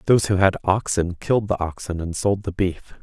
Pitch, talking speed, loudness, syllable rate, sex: 95 Hz, 220 wpm, -22 LUFS, 5.4 syllables/s, male